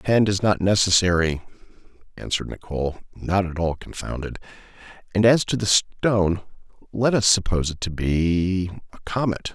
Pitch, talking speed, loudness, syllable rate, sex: 95 Hz, 150 wpm, -22 LUFS, 5.0 syllables/s, male